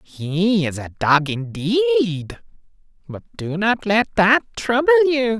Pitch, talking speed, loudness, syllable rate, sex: 210 Hz, 135 wpm, -18 LUFS, 3.8 syllables/s, male